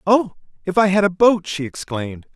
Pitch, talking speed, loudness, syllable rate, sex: 180 Hz, 205 wpm, -18 LUFS, 5.3 syllables/s, male